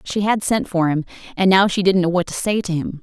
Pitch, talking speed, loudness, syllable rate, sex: 185 Hz, 295 wpm, -18 LUFS, 5.7 syllables/s, female